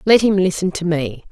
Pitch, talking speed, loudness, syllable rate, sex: 180 Hz, 230 wpm, -17 LUFS, 5.3 syllables/s, female